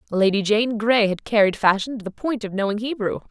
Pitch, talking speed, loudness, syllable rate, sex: 215 Hz, 220 wpm, -21 LUFS, 5.6 syllables/s, female